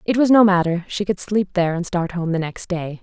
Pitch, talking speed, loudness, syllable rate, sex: 185 Hz, 280 wpm, -19 LUFS, 5.5 syllables/s, female